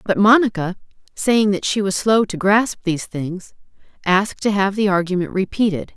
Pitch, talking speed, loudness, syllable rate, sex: 195 Hz, 170 wpm, -18 LUFS, 5.1 syllables/s, female